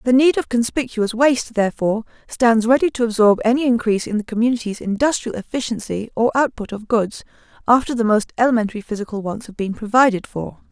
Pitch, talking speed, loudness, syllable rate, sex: 230 Hz, 175 wpm, -19 LUFS, 6.2 syllables/s, female